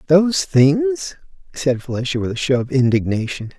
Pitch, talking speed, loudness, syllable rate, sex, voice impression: 140 Hz, 150 wpm, -18 LUFS, 5.0 syllables/s, male, masculine, adult-like, tensed, slightly powerful, clear, mature, friendly, unique, wild, lively, slightly strict, slightly sharp